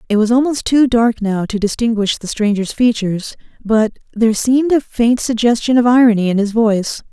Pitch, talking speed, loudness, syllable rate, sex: 225 Hz, 185 wpm, -15 LUFS, 5.5 syllables/s, female